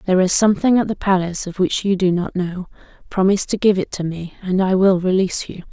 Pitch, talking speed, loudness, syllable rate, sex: 190 Hz, 240 wpm, -18 LUFS, 6.4 syllables/s, female